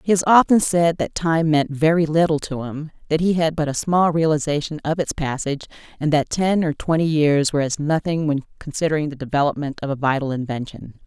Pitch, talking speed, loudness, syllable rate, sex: 155 Hz, 205 wpm, -20 LUFS, 5.7 syllables/s, female